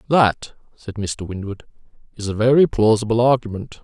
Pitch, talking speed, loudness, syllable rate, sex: 115 Hz, 140 wpm, -19 LUFS, 5.2 syllables/s, male